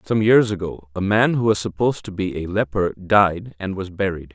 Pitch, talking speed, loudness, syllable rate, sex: 95 Hz, 220 wpm, -20 LUFS, 5.1 syllables/s, male